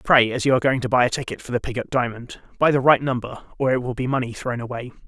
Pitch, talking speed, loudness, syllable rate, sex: 125 Hz, 270 wpm, -21 LUFS, 6.8 syllables/s, male